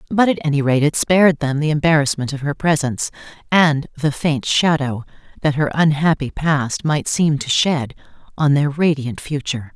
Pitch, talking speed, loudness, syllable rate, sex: 150 Hz, 170 wpm, -18 LUFS, 5.0 syllables/s, female